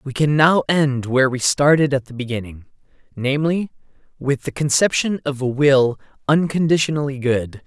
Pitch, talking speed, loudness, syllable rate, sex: 140 Hz, 150 wpm, -18 LUFS, 5.1 syllables/s, male